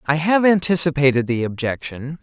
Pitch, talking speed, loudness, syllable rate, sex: 150 Hz, 135 wpm, -18 LUFS, 5.2 syllables/s, male